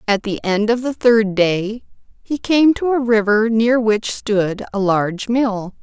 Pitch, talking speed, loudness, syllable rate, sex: 220 Hz, 185 wpm, -17 LUFS, 3.9 syllables/s, female